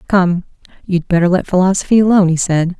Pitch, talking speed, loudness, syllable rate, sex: 180 Hz, 170 wpm, -14 LUFS, 6.2 syllables/s, female